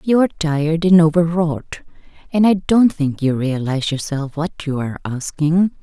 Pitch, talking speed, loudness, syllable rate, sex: 160 Hz, 165 wpm, -18 LUFS, 4.8 syllables/s, female